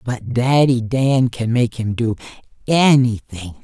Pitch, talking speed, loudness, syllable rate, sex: 120 Hz, 130 wpm, -17 LUFS, 3.7 syllables/s, male